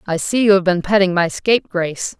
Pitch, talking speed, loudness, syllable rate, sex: 185 Hz, 220 wpm, -16 LUFS, 5.9 syllables/s, female